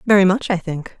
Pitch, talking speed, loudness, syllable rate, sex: 190 Hz, 240 wpm, -18 LUFS, 6.0 syllables/s, female